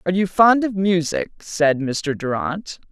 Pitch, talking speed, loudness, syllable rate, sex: 180 Hz, 165 wpm, -19 LUFS, 4.2 syllables/s, female